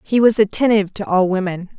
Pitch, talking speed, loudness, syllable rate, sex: 200 Hz, 200 wpm, -17 LUFS, 6.2 syllables/s, female